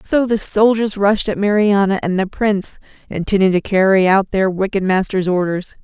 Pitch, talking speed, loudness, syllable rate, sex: 195 Hz, 175 wpm, -16 LUFS, 5.1 syllables/s, female